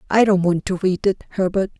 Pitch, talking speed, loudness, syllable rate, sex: 190 Hz, 235 wpm, -19 LUFS, 5.7 syllables/s, female